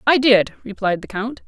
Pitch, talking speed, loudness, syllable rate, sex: 225 Hz, 205 wpm, -19 LUFS, 4.8 syllables/s, female